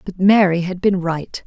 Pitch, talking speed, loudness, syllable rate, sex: 185 Hz, 205 wpm, -17 LUFS, 4.4 syllables/s, female